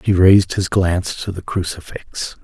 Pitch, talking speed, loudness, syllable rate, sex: 90 Hz, 175 wpm, -17 LUFS, 4.7 syllables/s, male